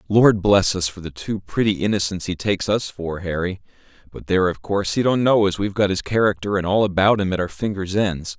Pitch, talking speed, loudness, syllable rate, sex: 95 Hz, 235 wpm, -20 LUFS, 5.8 syllables/s, male